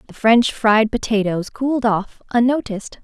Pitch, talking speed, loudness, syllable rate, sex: 225 Hz, 140 wpm, -18 LUFS, 4.7 syllables/s, female